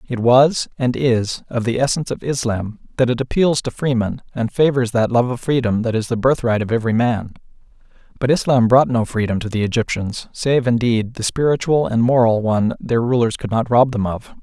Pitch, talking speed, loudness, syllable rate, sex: 120 Hz, 205 wpm, -18 LUFS, 5.4 syllables/s, male